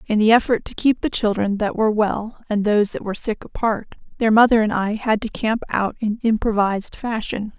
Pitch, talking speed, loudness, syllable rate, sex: 215 Hz, 215 wpm, -20 LUFS, 5.4 syllables/s, female